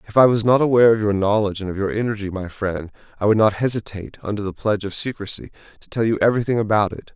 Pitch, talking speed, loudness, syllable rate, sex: 105 Hz, 245 wpm, -20 LUFS, 7.2 syllables/s, male